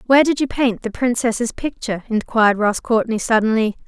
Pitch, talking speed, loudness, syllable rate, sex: 230 Hz, 170 wpm, -18 LUFS, 5.6 syllables/s, female